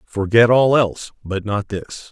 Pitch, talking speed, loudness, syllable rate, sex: 110 Hz, 170 wpm, -17 LUFS, 4.3 syllables/s, male